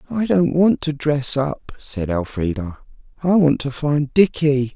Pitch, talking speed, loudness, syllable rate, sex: 145 Hz, 165 wpm, -19 LUFS, 3.9 syllables/s, male